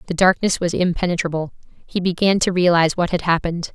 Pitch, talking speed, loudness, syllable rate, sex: 175 Hz, 175 wpm, -19 LUFS, 6.5 syllables/s, female